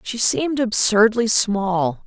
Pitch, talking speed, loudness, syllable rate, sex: 215 Hz, 115 wpm, -18 LUFS, 3.7 syllables/s, female